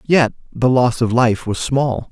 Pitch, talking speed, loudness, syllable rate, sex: 120 Hz, 200 wpm, -17 LUFS, 3.9 syllables/s, male